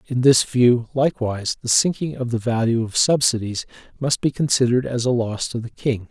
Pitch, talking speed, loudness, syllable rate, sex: 125 Hz, 195 wpm, -20 LUFS, 5.4 syllables/s, male